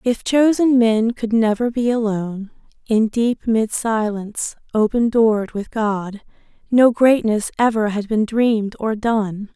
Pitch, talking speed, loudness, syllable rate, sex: 225 Hz, 145 wpm, -18 LUFS, 4.1 syllables/s, female